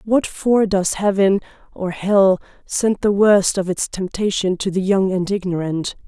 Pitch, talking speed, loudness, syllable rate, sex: 195 Hz, 150 wpm, -18 LUFS, 4.2 syllables/s, female